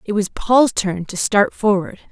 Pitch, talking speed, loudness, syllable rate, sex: 205 Hz, 200 wpm, -17 LUFS, 4.2 syllables/s, female